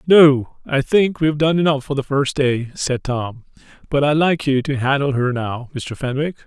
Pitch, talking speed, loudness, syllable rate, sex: 140 Hz, 205 wpm, -18 LUFS, 4.6 syllables/s, male